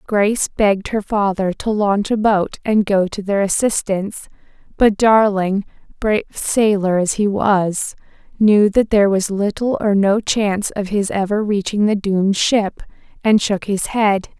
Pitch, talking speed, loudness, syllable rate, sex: 205 Hz, 165 wpm, -17 LUFS, 4.4 syllables/s, female